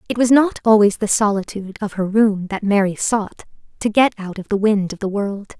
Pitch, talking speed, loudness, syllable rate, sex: 205 Hz, 225 wpm, -18 LUFS, 5.3 syllables/s, female